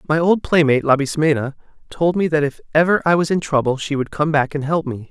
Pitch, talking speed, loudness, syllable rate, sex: 150 Hz, 235 wpm, -18 LUFS, 6.1 syllables/s, male